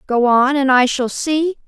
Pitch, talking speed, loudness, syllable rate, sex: 270 Hz, 215 wpm, -15 LUFS, 4.1 syllables/s, female